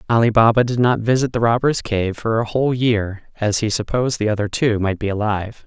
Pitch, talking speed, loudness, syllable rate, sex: 110 Hz, 225 wpm, -18 LUFS, 5.8 syllables/s, male